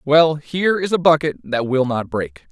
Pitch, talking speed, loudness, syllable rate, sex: 150 Hz, 215 wpm, -18 LUFS, 4.8 syllables/s, male